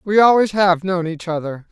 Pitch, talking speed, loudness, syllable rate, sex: 180 Hz, 210 wpm, -17 LUFS, 5.0 syllables/s, male